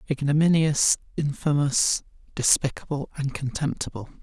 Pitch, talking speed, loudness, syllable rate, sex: 140 Hz, 70 wpm, -24 LUFS, 4.7 syllables/s, male